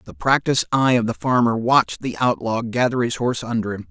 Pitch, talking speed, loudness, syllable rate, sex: 115 Hz, 215 wpm, -20 LUFS, 6.0 syllables/s, male